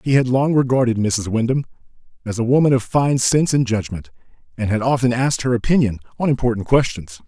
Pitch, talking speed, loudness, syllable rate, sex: 120 Hz, 190 wpm, -18 LUFS, 6.1 syllables/s, male